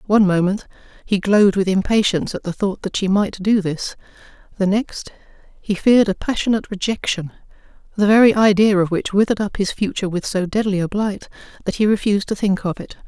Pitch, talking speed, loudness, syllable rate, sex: 200 Hz, 195 wpm, -18 LUFS, 6.1 syllables/s, female